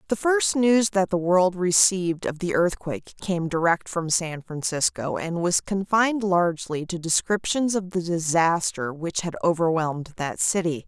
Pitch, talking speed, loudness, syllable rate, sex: 175 Hz, 160 wpm, -23 LUFS, 4.6 syllables/s, female